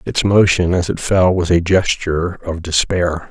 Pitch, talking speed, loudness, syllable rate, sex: 90 Hz, 180 wpm, -16 LUFS, 4.4 syllables/s, male